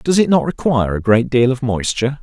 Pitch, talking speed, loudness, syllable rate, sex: 130 Hz, 240 wpm, -16 LUFS, 5.9 syllables/s, male